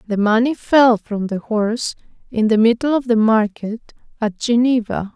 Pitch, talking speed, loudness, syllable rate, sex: 225 Hz, 165 wpm, -17 LUFS, 4.6 syllables/s, female